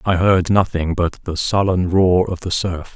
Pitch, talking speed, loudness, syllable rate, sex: 90 Hz, 205 wpm, -17 LUFS, 4.3 syllables/s, male